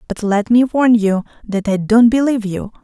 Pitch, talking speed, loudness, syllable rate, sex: 220 Hz, 210 wpm, -15 LUFS, 5.0 syllables/s, female